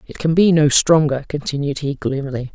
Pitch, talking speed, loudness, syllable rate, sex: 145 Hz, 190 wpm, -17 LUFS, 5.5 syllables/s, female